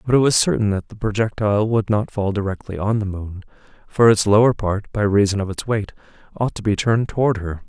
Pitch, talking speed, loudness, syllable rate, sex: 105 Hz, 225 wpm, -19 LUFS, 5.8 syllables/s, male